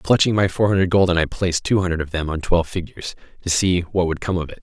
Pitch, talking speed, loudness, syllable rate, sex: 90 Hz, 270 wpm, -20 LUFS, 6.7 syllables/s, male